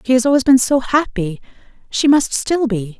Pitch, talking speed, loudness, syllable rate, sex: 250 Hz, 180 wpm, -16 LUFS, 5.0 syllables/s, female